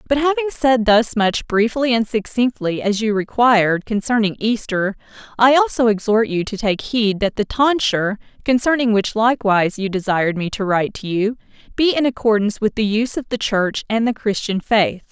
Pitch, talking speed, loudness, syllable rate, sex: 220 Hz, 185 wpm, -18 LUFS, 5.3 syllables/s, female